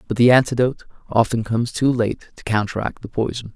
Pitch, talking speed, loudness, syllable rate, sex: 115 Hz, 185 wpm, -20 LUFS, 6.2 syllables/s, male